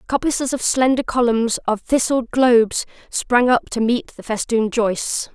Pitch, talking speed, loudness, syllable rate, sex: 240 Hz, 155 wpm, -19 LUFS, 4.6 syllables/s, female